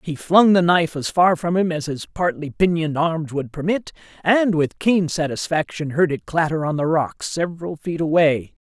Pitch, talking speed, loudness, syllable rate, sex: 160 Hz, 195 wpm, -20 LUFS, 4.9 syllables/s, male